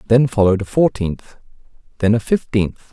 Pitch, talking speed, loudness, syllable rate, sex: 110 Hz, 145 wpm, -17 LUFS, 5.6 syllables/s, male